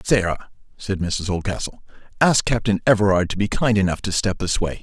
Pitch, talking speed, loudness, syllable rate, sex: 100 Hz, 185 wpm, -21 LUFS, 5.4 syllables/s, male